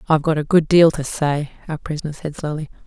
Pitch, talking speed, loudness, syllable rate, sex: 155 Hz, 230 wpm, -19 LUFS, 6.3 syllables/s, female